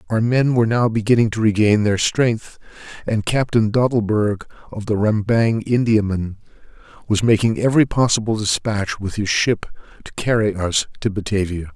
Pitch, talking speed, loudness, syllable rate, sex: 110 Hz, 150 wpm, -18 LUFS, 5.0 syllables/s, male